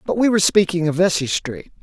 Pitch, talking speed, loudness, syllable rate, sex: 175 Hz, 230 wpm, -18 LUFS, 6.1 syllables/s, male